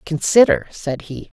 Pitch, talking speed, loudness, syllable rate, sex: 155 Hz, 130 wpm, -17 LUFS, 4.2 syllables/s, female